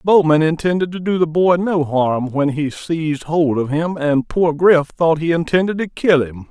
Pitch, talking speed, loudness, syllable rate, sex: 160 Hz, 210 wpm, -17 LUFS, 4.6 syllables/s, male